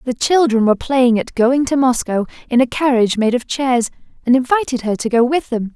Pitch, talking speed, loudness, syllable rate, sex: 250 Hz, 220 wpm, -16 LUFS, 5.5 syllables/s, female